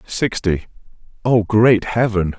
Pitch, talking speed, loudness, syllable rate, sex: 105 Hz, 75 wpm, -17 LUFS, 3.6 syllables/s, male